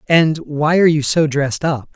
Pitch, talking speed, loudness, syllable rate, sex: 150 Hz, 215 wpm, -16 LUFS, 5.1 syllables/s, male